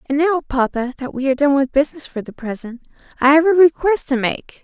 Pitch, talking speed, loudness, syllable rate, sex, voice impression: 280 Hz, 235 wpm, -17 LUFS, 6.0 syllables/s, female, very feminine, slightly young, slightly powerful, slightly unique, slightly kind